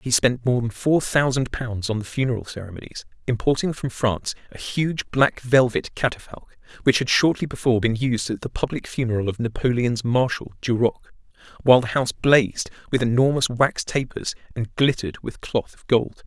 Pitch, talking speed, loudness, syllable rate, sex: 125 Hz, 175 wpm, -22 LUFS, 5.4 syllables/s, male